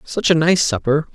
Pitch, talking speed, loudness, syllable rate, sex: 155 Hz, 210 wpm, -17 LUFS, 5.0 syllables/s, male